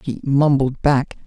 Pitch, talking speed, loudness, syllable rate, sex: 140 Hz, 140 wpm, -18 LUFS, 3.8 syllables/s, male